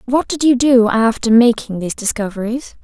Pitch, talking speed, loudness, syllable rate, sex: 235 Hz, 170 wpm, -15 LUFS, 5.2 syllables/s, female